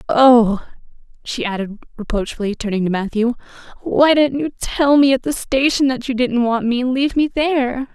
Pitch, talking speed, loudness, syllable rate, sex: 250 Hz, 180 wpm, -17 LUFS, 5.1 syllables/s, female